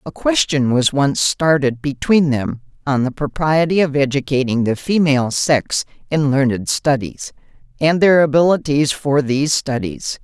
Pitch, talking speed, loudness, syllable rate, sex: 145 Hz, 140 wpm, -16 LUFS, 4.5 syllables/s, female